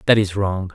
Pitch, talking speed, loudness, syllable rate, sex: 100 Hz, 240 wpm, -20 LUFS, 5.1 syllables/s, male